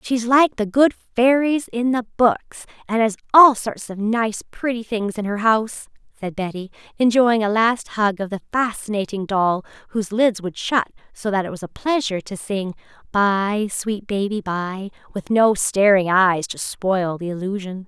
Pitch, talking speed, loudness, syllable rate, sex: 210 Hz, 180 wpm, -20 LUFS, 4.5 syllables/s, female